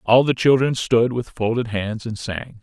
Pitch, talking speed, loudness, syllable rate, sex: 115 Hz, 205 wpm, -20 LUFS, 4.4 syllables/s, male